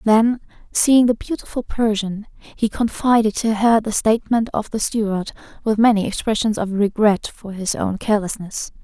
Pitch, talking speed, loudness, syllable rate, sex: 215 Hz, 155 wpm, -19 LUFS, 4.8 syllables/s, female